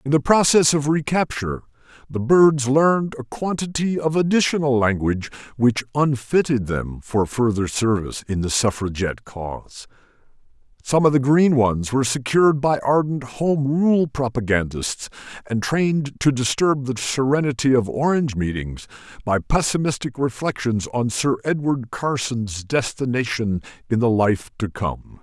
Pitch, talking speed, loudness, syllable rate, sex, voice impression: 130 Hz, 135 wpm, -20 LUFS, 4.7 syllables/s, male, very masculine, very adult-like, very middle-aged, slightly old, very thick, very tensed, very powerful, bright, slightly soft, muffled, fluent, very cool, intellectual, sincere, very calm, very mature, slightly friendly, slightly reassuring, elegant, slightly wild, very lively, slightly strict, slightly intense